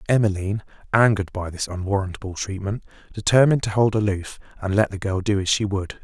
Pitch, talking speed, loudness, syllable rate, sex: 100 Hz, 180 wpm, -22 LUFS, 6.2 syllables/s, male